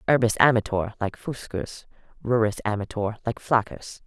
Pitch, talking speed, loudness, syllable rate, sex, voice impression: 110 Hz, 120 wpm, -24 LUFS, 4.9 syllables/s, female, feminine, very adult-like, middle-aged, slightly thin, slightly tensed, slightly weak, slightly dark, hard, clear, fluent, slightly raspy, slightly cool, slightly intellectual, refreshing, sincere, very calm, slightly friendly, reassuring, slightly unique, elegant, slightly lively, very kind, modest